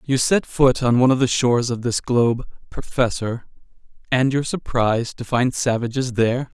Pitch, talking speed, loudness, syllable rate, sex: 125 Hz, 175 wpm, -20 LUFS, 5.4 syllables/s, male